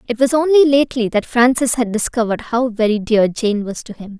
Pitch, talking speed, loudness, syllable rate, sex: 235 Hz, 215 wpm, -16 LUFS, 5.7 syllables/s, female